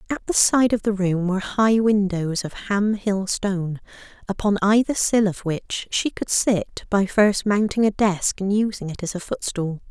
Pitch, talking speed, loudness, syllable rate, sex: 200 Hz, 195 wpm, -21 LUFS, 4.5 syllables/s, female